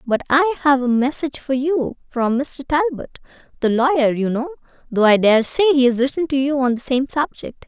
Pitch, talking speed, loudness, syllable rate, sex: 270 Hz, 210 wpm, -18 LUFS, 5.3 syllables/s, female